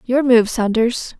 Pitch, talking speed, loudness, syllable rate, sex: 240 Hz, 150 wpm, -16 LUFS, 3.7 syllables/s, female